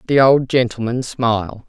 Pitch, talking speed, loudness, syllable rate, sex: 120 Hz, 145 wpm, -17 LUFS, 4.7 syllables/s, female